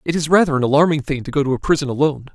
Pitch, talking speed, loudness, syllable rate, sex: 145 Hz, 305 wpm, -17 LUFS, 8.2 syllables/s, male